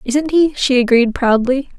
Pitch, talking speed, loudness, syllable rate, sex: 260 Hz, 170 wpm, -14 LUFS, 4.3 syllables/s, female